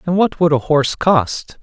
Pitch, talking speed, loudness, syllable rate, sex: 155 Hz, 220 wpm, -16 LUFS, 4.7 syllables/s, male